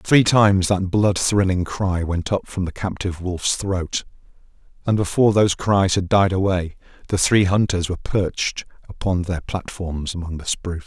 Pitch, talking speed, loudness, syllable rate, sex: 95 Hz, 170 wpm, -20 LUFS, 4.9 syllables/s, male